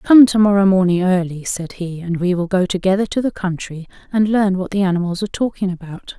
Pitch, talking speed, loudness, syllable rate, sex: 190 Hz, 225 wpm, -17 LUFS, 5.8 syllables/s, female